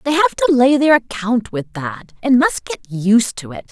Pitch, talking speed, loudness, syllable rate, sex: 225 Hz, 225 wpm, -16 LUFS, 4.7 syllables/s, female